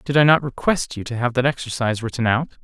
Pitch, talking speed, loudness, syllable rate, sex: 125 Hz, 250 wpm, -20 LUFS, 6.7 syllables/s, male